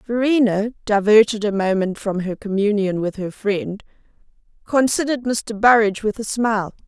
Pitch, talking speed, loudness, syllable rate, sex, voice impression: 210 Hz, 140 wpm, -19 LUFS, 5.0 syllables/s, female, feminine, slightly old, tensed, powerful, muffled, halting, slightly friendly, lively, strict, slightly intense, slightly sharp